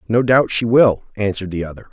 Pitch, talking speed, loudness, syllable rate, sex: 110 Hz, 220 wpm, -17 LUFS, 6.1 syllables/s, male